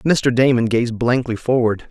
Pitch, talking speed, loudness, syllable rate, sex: 120 Hz, 160 wpm, -17 LUFS, 4.3 syllables/s, male